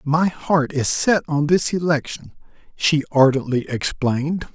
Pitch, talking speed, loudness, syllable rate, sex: 150 Hz, 130 wpm, -19 LUFS, 4.2 syllables/s, male